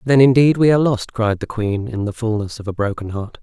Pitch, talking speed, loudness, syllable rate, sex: 115 Hz, 265 wpm, -18 LUFS, 5.7 syllables/s, male